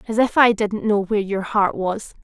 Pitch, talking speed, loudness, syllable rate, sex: 210 Hz, 240 wpm, -19 LUFS, 5.0 syllables/s, female